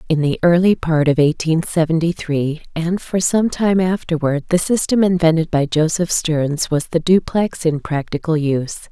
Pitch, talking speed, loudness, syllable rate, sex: 165 Hz, 170 wpm, -17 LUFS, 4.6 syllables/s, female